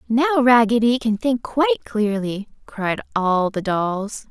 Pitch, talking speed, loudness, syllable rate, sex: 230 Hz, 140 wpm, -19 LUFS, 4.1 syllables/s, female